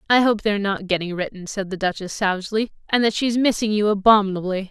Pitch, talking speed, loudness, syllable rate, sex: 205 Hz, 215 wpm, -21 LUFS, 6.7 syllables/s, female